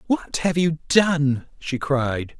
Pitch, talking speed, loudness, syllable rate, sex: 150 Hz, 150 wpm, -22 LUFS, 2.8 syllables/s, male